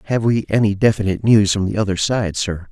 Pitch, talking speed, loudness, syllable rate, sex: 100 Hz, 220 wpm, -17 LUFS, 6.0 syllables/s, male